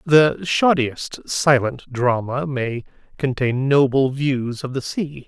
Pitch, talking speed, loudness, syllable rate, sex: 135 Hz, 125 wpm, -20 LUFS, 3.4 syllables/s, male